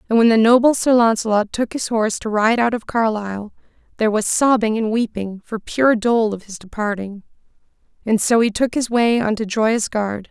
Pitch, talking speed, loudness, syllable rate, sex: 220 Hz, 200 wpm, -18 LUFS, 5.2 syllables/s, female